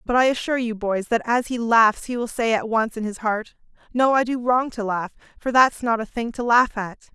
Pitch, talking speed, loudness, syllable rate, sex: 230 Hz, 260 wpm, -21 LUFS, 5.3 syllables/s, female